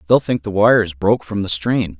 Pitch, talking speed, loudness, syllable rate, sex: 100 Hz, 240 wpm, -17 LUFS, 5.5 syllables/s, male